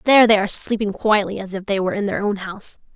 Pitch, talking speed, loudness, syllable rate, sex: 205 Hz, 265 wpm, -19 LUFS, 7.1 syllables/s, female